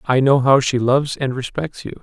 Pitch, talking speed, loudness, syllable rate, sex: 130 Hz, 235 wpm, -17 LUFS, 5.4 syllables/s, male